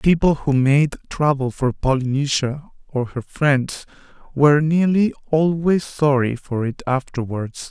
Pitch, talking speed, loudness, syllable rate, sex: 140 Hz, 125 wpm, -19 LUFS, 4.1 syllables/s, male